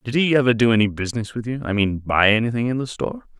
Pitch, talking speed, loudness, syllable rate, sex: 120 Hz, 245 wpm, -20 LUFS, 7.0 syllables/s, male